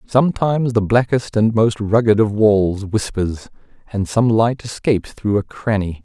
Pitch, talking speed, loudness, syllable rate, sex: 110 Hz, 160 wpm, -17 LUFS, 4.6 syllables/s, male